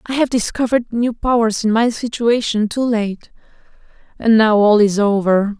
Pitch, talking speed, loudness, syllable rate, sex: 225 Hz, 150 wpm, -16 LUFS, 4.8 syllables/s, female